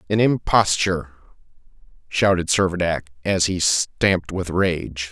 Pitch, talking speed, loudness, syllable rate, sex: 90 Hz, 105 wpm, -20 LUFS, 4.4 syllables/s, male